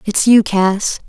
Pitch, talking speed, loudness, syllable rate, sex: 205 Hz, 165 wpm, -13 LUFS, 3.2 syllables/s, female